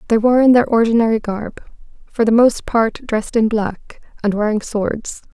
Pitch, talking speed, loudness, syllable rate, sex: 225 Hz, 180 wpm, -16 LUFS, 5.0 syllables/s, female